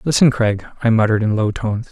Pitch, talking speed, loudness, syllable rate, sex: 110 Hz, 220 wpm, -17 LUFS, 6.8 syllables/s, male